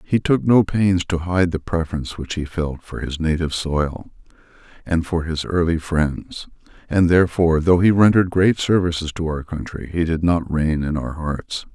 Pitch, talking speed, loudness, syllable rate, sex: 85 Hz, 190 wpm, -20 LUFS, 4.9 syllables/s, male